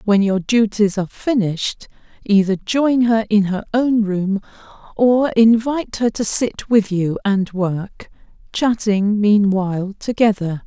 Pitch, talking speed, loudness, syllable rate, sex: 210 Hz, 135 wpm, -17 LUFS, 4.0 syllables/s, female